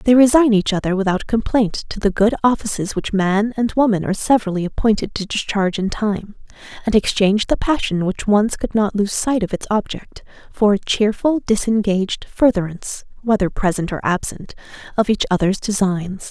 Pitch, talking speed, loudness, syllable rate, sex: 210 Hz, 175 wpm, -18 LUFS, 5.4 syllables/s, female